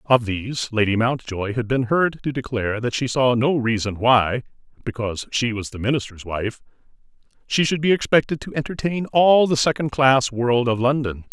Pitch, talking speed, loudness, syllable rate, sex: 125 Hz, 180 wpm, -20 LUFS, 5.1 syllables/s, male